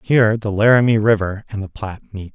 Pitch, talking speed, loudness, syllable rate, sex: 105 Hz, 205 wpm, -16 LUFS, 5.9 syllables/s, male